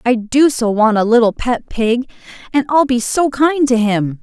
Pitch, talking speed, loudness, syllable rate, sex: 245 Hz, 215 wpm, -14 LUFS, 4.4 syllables/s, female